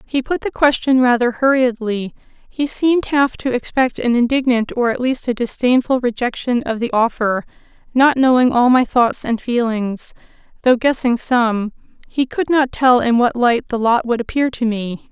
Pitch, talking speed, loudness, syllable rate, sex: 245 Hz, 180 wpm, -17 LUFS, 4.7 syllables/s, female